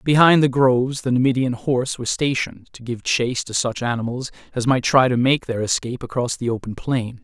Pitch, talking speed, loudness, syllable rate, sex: 125 Hz, 205 wpm, -20 LUFS, 5.8 syllables/s, male